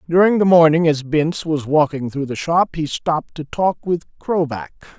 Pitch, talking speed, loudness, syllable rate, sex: 160 Hz, 195 wpm, -18 LUFS, 4.8 syllables/s, male